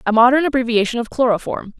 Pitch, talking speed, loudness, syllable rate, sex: 240 Hz, 165 wpm, -17 LUFS, 6.7 syllables/s, female